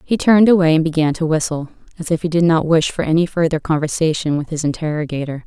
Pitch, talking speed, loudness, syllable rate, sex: 160 Hz, 220 wpm, -17 LUFS, 6.5 syllables/s, female